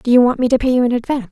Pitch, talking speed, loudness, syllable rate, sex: 250 Hz, 410 wpm, -15 LUFS, 8.7 syllables/s, female